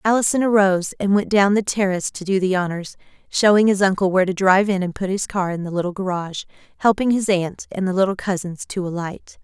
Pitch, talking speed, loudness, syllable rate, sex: 190 Hz, 225 wpm, -19 LUFS, 6.2 syllables/s, female